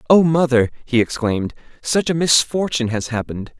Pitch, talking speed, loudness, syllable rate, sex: 135 Hz, 150 wpm, -18 LUFS, 5.6 syllables/s, male